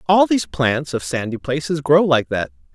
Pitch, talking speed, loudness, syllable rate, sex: 140 Hz, 195 wpm, -19 LUFS, 5.0 syllables/s, male